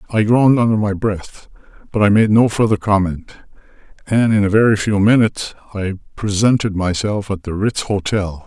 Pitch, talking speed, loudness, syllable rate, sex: 105 Hz, 170 wpm, -16 LUFS, 5.2 syllables/s, male